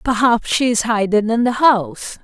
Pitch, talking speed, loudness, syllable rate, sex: 225 Hz, 190 wpm, -16 LUFS, 4.7 syllables/s, female